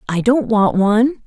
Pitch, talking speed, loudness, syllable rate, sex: 225 Hz, 190 wpm, -15 LUFS, 5.1 syllables/s, female